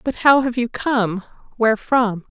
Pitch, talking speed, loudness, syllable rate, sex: 235 Hz, 180 wpm, -18 LUFS, 4.3 syllables/s, female